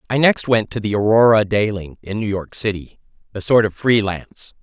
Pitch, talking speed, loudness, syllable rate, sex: 105 Hz, 195 wpm, -17 LUFS, 5.3 syllables/s, male